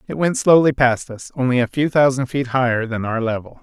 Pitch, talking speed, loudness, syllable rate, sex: 130 Hz, 230 wpm, -18 LUFS, 5.5 syllables/s, male